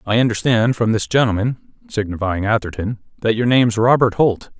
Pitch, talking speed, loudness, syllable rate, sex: 115 Hz, 145 wpm, -18 LUFS, 5.7 syllables/s, male